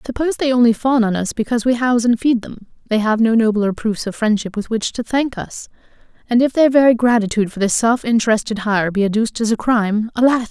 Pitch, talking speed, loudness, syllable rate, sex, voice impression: 230 Hz, 230 wpm, -17 LUFS, 6.2 syllables/s, female, feminine, slightly adult-like, clear, slightly fluent, slightly refreshing, friendly, slightly lively